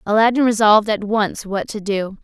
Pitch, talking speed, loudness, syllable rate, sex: 210 Hz, 190 wpm, -17 LUFS, 5.3 syllables/s, female